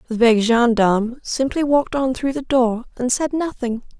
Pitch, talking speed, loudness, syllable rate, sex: 250 Hz, 180 wpm, -19 LUFS, 4.9 syllables/s, female